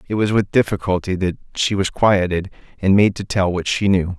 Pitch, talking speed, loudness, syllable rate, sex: 95 Hz, 215 wpm, -18 LUFS, 5.3 syllables/s, male